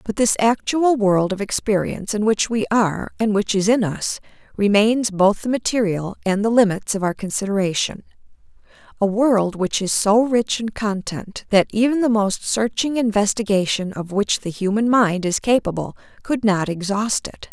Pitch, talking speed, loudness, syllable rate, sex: 210 Hz, 170 wpm, -19 LUFS, 4.7 syllables/s, female